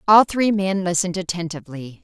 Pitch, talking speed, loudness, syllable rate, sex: 180 Hz, 150 wpm, -20 LUFS, 5.9 syllables/s, female